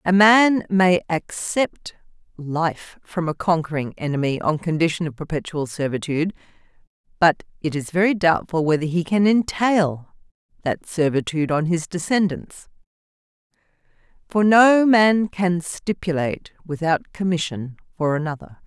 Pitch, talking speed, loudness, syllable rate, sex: 170 Hz, 120 wpm, -20 LUFS, 4.5 syllables/s, female